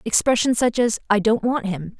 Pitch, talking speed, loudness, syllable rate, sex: 225 Hz, 210 wpm, -20 LUFS, 5.0 syllables/s, female